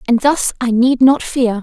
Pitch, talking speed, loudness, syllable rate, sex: 245 Hz, 220 wpm, -14 LUFS, 4.3 syllables/s, female